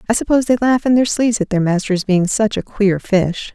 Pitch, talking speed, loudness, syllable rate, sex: 210 Hz, 255 wpm, -16 LUFS, 5.8 syllables/s, female